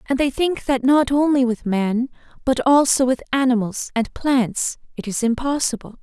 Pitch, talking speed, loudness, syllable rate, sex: 255 Hz, 170 wpm, -20 LUFS, 4.7 syllables/s, female